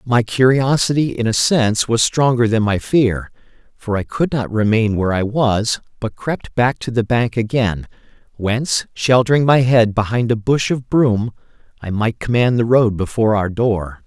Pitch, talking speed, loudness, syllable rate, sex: 115 Hz, 180 wpm, -17 LUFS, 4.6 syllables/s, male